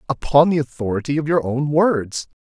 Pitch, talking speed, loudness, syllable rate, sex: 140 Hz, 175 wpm, -19 LUFS, 5.2 syllables/s, male